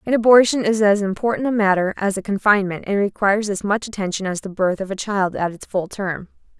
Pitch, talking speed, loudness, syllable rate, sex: 200 Hz, 225 wpm, -19 LUFS, 6.1 syllables/s, female